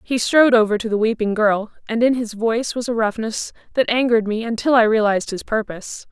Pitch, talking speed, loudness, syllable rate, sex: 225 Hz, 215 wpm, -19 LUFS, 6.1 syllables/s, female